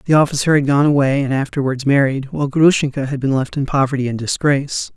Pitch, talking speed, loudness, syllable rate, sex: 140 Hz, 205 wpm, -17 LUFS, 6.3 syllables/s, male